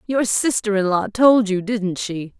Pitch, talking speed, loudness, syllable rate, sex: 205 Hz, 200 wpm, -19 LUFS, 4.1 syllables/s, female